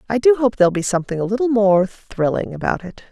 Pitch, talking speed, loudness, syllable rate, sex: 210 Hz, 230 wpm, -18 LUFS, 6.4 syllables/s, female